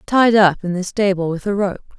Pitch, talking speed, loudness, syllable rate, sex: 195 Hz, 240 wpm, -17 LUFS, 5.2 syllables/s, female